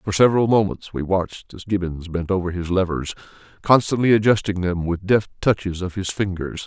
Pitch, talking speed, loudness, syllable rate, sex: 95 Hz, 180 wpm, -21 LUFS, 5.5 syllables/s, male